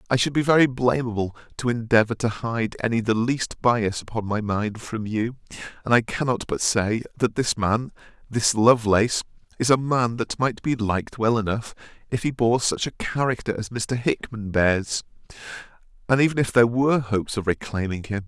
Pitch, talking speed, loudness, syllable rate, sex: 115 Hz, 175 wpm, -23 LUFS, 5.2 syllables/s, male